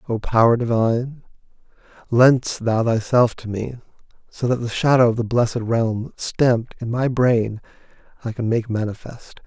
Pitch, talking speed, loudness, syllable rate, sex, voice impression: 115 Hz, 150 wpm, -20 LUFS, 4.6 syllables/s, male, masculine, adult-like, relaxed, weak, slightly dark, soft, muffled, slightly raspy, sincere, calm, wild, modest